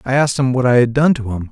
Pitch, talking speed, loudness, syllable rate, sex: 125 Hz, 355 wpm, -15 LUFS, 7.1 syllables/s, male